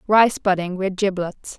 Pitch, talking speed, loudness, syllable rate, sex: 190 Hz, 150 wpm, -20 LUFS, 4.2 syllables/s, female